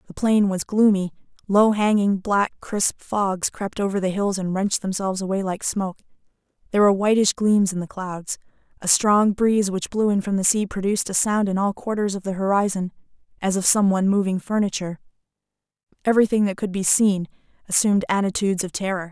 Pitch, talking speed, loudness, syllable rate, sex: 195 Hz, 185 wpm, -21 LUFS, 5.8 syllables/s, female